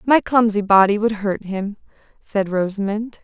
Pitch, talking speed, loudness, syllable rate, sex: 210 Hz, 150 wpm, -18 LUFS, 4.5 syllables/s, female